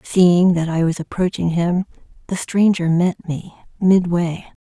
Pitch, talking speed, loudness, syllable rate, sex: 175 Hz, 145 wpm, -18 LUFS, 4.0 syllables/s, female